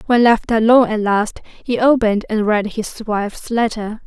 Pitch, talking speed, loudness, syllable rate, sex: 220 Hz, 175 wpm, -16 LUFS, 4.8 syllables/s, female